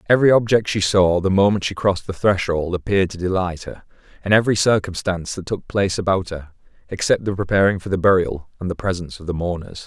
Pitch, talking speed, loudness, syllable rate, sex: 95 Hz, 205 wpm, -19 LUFS, 6.4 syllables/s, male